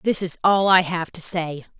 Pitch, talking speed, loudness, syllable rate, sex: 175 Hz, 235 wpm, -20 LUFS, 4.6 syllables/s, female